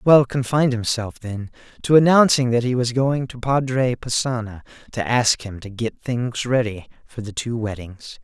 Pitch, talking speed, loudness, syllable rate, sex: 120 Hz, 175 wpm, -20 LUFS, 4.8 syllables/s, male